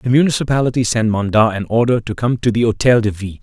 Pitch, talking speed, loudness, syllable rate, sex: 115 Hz, 230 wpm, -16 LUFS, 6.6 syllables/s, male